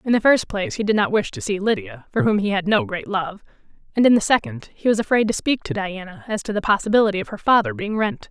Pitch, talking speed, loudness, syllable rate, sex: 210 Hz, 275 wpm, -20 LUFS, 6.4 syllables/s, female